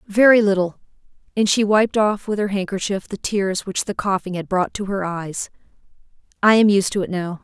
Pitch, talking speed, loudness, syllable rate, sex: 195 Hz, 200 wpm, -19 LUFS, 5.1 syllables/s, female